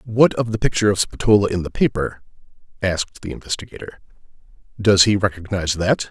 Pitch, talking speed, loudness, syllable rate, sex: 100 Hz, 155 wpm, -19 LUFS, 6.2 syllables/s, male